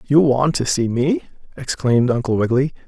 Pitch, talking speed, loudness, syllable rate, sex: 135 Hz, 165 wpm, -18 LUFS, 5.6 syllables/s, male